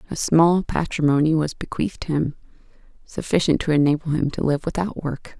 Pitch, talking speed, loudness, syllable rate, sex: 155 Hz, 155 wpm, -21 LUFS, 5.3 syllables/s, female